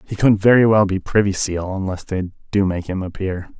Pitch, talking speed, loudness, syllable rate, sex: 95 Hz, 235 wpm, -18 LUFS, 5.1 syllables/s, male